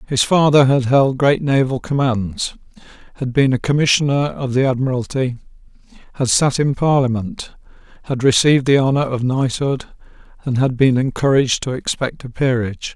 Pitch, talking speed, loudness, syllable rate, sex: 135 Hz, 150 wpm, -17 LUFS, 5.2 syllables/s, male